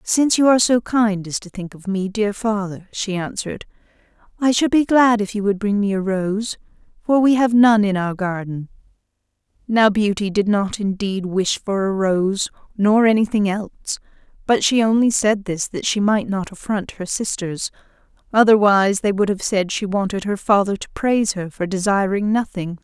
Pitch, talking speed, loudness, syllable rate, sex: 205 Hz, 185 wpm, -19 LUFS, 4.9 syllables/s, female